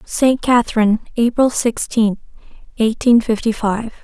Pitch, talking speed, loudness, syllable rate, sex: 230 Hz, 105 wpm, -16 LUFS, 4.5 syllables/s, female